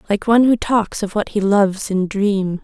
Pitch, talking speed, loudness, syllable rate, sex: 205 Hz, 230 wpm, -17 LUFS, 4.9 syllables/s, female